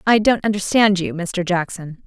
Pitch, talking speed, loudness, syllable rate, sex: 190 Hz, 175 wpm, -18 LUFS, 4.6 syllables/s, female